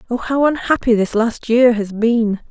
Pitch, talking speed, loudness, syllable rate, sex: 235 Hz, 190 wpm, -16 LUFS, 4.4 syllables/s, female